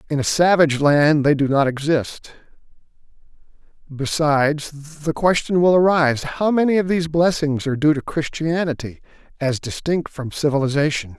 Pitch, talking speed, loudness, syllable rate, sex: 150 Hz, 140 wpm, -19 LUFS, 5.1 syllables/s, male